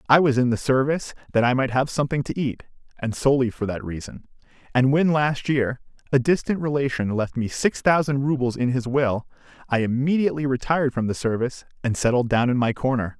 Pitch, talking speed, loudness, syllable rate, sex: 130 Hz, 200 wpm, -22 LUFS, 5.6 syllables/s, male